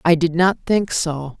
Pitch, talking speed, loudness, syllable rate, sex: 165 Hz, 215 wpm, -19 LUFS, 3.9 syllables/s, female